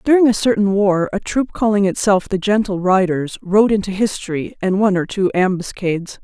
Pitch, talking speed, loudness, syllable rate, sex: 195 Hz, 185 wpm, -17 LUFS, 5.3 syllables/s, female